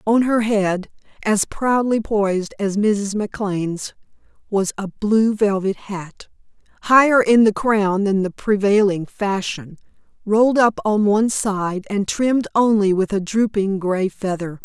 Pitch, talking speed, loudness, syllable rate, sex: 205 Hz, 145 wpm, -19 LUFS, 4.1 syllables/s, female